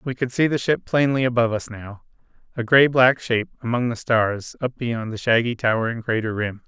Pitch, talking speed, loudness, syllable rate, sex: 120 Hz, 205 wpm, -21 LUFS, 5.4 syllables/s, male